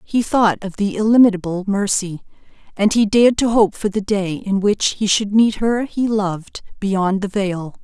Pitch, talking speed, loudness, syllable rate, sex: 205 Hz, 190 wpm, -17 LUFS, 4.6 syllables/s, female